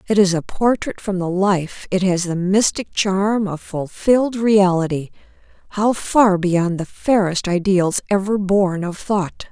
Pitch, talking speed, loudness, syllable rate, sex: 190 Hz, 150 wpm, -18 LUFS, 4.0 syllables/s, female